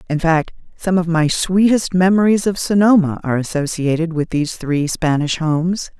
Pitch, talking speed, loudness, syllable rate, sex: 170 Hz, 160 wpm, -17 LUFS, 5.1 syllables/s, female